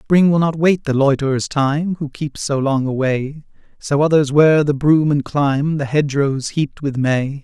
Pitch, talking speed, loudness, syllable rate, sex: 145 Hz, 195 wpm, -17 LUFS, 4.4 syllables/s, male